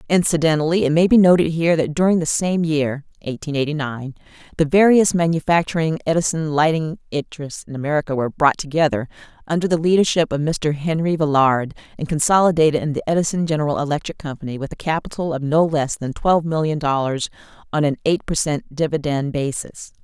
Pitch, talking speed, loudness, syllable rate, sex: 155 Hz, 170 wpm, -19 LUFS, 5.9 syllables/s, female